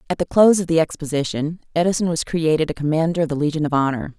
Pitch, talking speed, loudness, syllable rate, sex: 160 Hz, 230 wpm, -19 LUFS, 7.1 syllables/s, female